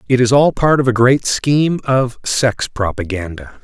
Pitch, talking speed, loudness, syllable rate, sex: 125 Hz, 180 wpm, -15 LUFS, 4.5 syllables/s, male